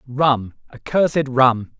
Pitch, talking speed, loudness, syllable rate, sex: 130 Hz, 100 wpm, -18 LUFS, 3.7 syllables/s, male